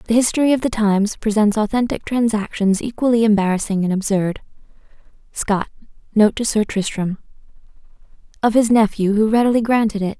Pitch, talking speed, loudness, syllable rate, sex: 215 Hz, 135 wpm, -18 LUFS, 5.9 syllables/s, female